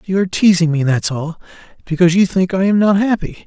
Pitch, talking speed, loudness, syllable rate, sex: 180 Hz, 190 wpm, -15 LUFS, 5.3 syllables/s, male